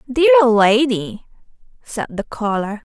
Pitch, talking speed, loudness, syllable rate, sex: 240 Hz, 105 wpm, -16 LUFS, 3.5 syllables/s, female